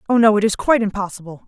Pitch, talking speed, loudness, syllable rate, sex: 210 Hz, 245 wpm, -17 LUFS, 7.9 syllables/s, female